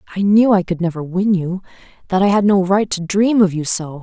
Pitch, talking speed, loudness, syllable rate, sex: 190 Hz, 240 wpm, -16 LUFS, 5.6 syllables/s, female